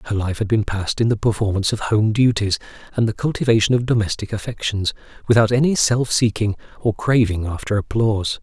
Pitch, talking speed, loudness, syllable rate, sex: 110 Hz, 180 wpm, -19 LUFS, 6.0 syllables/s, male